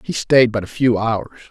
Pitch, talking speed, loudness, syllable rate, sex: 115 Hz, 240 wpm, -17 LUFS, 4.6 syllables/s, male